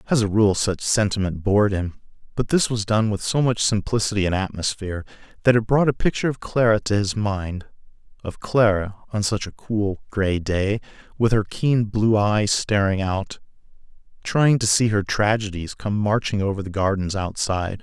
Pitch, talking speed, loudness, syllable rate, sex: 105 Hz, 180 wpm, -21 LUFS, 5.0 syllables/s, male